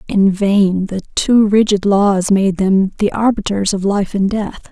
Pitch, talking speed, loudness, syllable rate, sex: 200 Hz, 180 wpm, -14 LUFS, 3.9 syllables/s, female